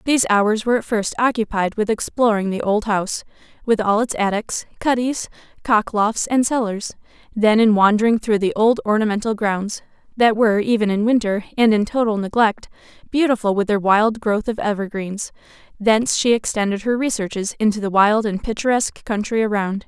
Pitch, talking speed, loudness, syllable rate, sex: 215 Hz, 170 wpm, -19 LUFS, 5.4 syllables/s, female